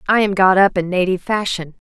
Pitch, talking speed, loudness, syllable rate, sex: 190 Hz, 225 wpm, -16 LUFS, 6.2 syllables/s, female